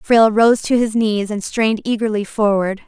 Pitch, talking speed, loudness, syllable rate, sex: 215 Hz, 190 wpm, -16 LUFS, 5.1 syllables/s, female